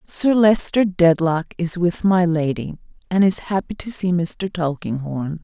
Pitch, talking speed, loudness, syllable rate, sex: 175 Hz, 155 wpm, -19 LUFS, 4.2 syllables/s, female